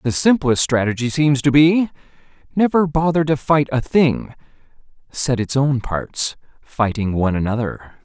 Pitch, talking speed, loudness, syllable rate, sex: 135 Hz, 135 wpm, -18 LUFS, 4.5 syllables/s, male